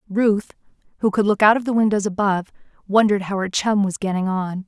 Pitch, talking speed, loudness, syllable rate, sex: 200 Hz, 205 wpm, -20 LUFS, 6.0 syllables/s, female